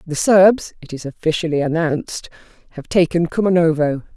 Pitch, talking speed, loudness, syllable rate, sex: 165 Hz, 130 wpm, -17 LUFS, 5.3 syllables/s, female